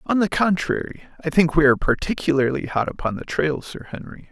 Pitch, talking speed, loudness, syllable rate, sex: 160 Hz, 195 wpm, -21 LUFS, 5.9 syllables/s, male